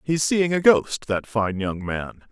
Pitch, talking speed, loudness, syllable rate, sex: 125 Hz, 180 wpm, -22 LUFS, 3.9 syllables/s, male